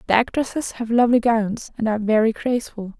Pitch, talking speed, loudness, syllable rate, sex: 225 Hz, 180 wpm, -20 LUFS, 6.2 syllables/s, female